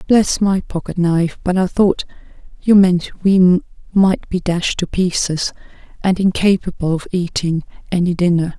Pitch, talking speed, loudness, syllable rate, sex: 180 Hz, 145 wpm, -16 LUFS, 4.8 syllables/s, female